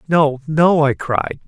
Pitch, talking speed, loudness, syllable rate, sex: 150 Hz, 165 wpm, -16 LUFS, 3.3 syllables/s, male